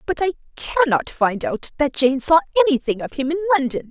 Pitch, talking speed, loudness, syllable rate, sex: 270 Hz, 200 wpm, -19 LUFS, 5.8 syllables/s, female